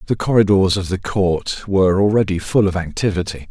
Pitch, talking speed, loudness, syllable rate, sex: 95 Hz, 170 wpm, -17 LUFS, 5.5 syllables/s, male